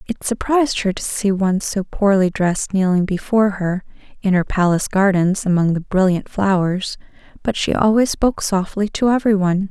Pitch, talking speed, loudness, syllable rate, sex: 195 Hz, 165 wpm, -18 LUFS, 5.4 syllables/s, female